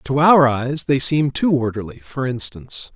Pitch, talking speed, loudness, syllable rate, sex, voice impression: 130 Hz, 185 wpm, -17 LUFS, 4.7 syllables/s, male, masculine, adult-like, slightly thick, cool, sincere, kind